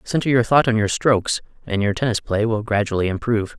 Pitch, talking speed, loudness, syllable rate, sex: 110 Hz, 215 wpm, -20 LUFS, 6.2 syllables/s, male